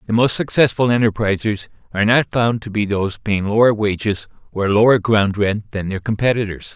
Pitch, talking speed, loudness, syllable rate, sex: 110 Hz, 180 wpm, -17 LUFS, 5.4 syllables/s, male